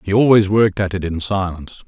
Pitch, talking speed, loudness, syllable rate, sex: 95 Hz, 225 wpm, -16 LUFS, 6.5 syllables/s, male